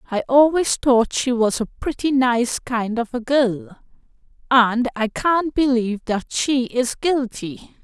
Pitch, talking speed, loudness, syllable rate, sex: 250 Hz, 155 wpm, -19 LUFS, 3.7 syllables/s, female